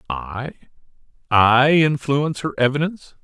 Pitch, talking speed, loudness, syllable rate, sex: 135 Hz, 75 wpm, -18 LUFS, 4.7 syllables/s, male